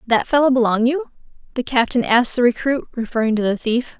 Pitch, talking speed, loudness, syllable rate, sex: 245 Hz, 195 wpm, -18 LUFS, 5.9 syllables/s, female